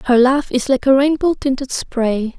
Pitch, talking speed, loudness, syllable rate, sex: 260 Hz, 200 wpm, -16 LUFS, 4.6 syllables/s, female